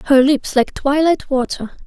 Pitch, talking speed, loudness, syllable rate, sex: 275 Hz, 160 wpm, -16 LUFS, 4.0 syllables/s, female